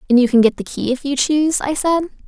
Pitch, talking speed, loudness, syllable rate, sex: 275 Hz, 290 wpm, -17 LUFS, 7.1 syllables/s, female